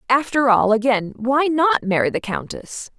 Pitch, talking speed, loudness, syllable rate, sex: 245 Hz, 160 wpm, -18 LUFS, 4.4 syllables/s, female